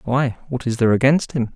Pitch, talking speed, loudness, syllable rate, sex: 125 Hz, 230 wpm, -19 LUFS, 6.1 syllables/s, male